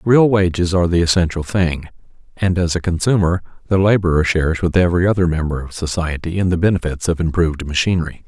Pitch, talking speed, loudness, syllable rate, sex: 85 Hz, 180 wpm, -17 LUFS, 6.3 syllables/s, male